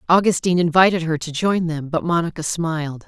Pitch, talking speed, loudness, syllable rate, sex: 165 Hz, 175 wpm, -19 LUFS, 5.9 syllables/s, female